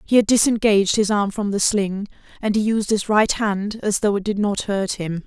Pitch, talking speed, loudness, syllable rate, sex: 205 Hz, 240 wpm, -20 LUFS, 5.0 syllables/s, female